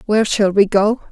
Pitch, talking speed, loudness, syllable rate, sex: 205 Hz, 215 wpm, -15 LUFS, 5.4 syllables/s, female